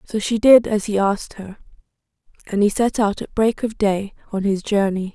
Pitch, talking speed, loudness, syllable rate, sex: 205 Hz, 210 wpm, -19 LUFS, 5.0 syllables/s, female